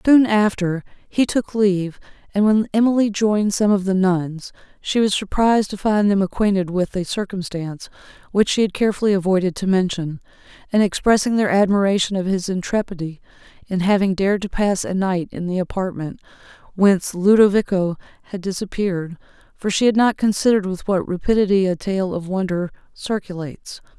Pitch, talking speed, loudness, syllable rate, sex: 195 Hz, 160 wpm, -19 LUFS, 5.6 syllables/s, female